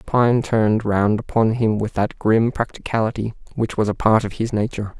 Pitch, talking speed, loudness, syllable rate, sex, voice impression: 110 Hz, 190 wpm, -20 LUFS, 5.2 syllables/s, male, masculine, slightly young, slightly adult-like, thick, slightly relaxed, weak, slightly dark, slightly hard, slightly muffled, fluent, slightly raspy, cool, slightly intellectual, slightly mature, slightly friendly, very unique, wild, slightly sweet